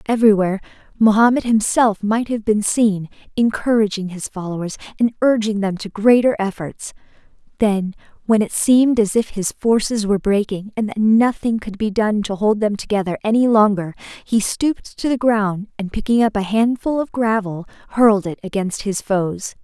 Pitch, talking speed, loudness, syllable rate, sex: 215 Hz, 170 wpm, -18 LUFS, 5.1 syllables/s, female